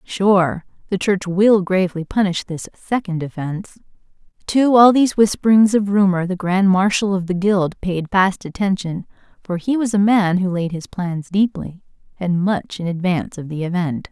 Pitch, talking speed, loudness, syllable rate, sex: 190 Hz, 175 wpm, -18 LUFS, 4.7 syllables/s, female